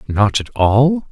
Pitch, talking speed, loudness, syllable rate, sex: 120 Hz, 160 wpm, -15 LUFS, 3.3 syllables/s, male